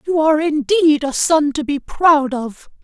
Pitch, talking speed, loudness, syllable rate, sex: 285 Hz, 190 wpm, -16 LUFS, 4.3 syllables/s, male